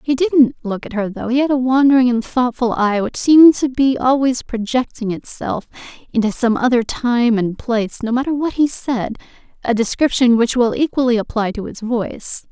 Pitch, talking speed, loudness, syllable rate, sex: 245 Hz, 190 wpm, -17 LUFS, 5.1 syllables/s, female